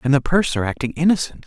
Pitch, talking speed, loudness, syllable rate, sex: 145 Hz, 205 wpm, -19 LUFS, 6.6 syllables/s, male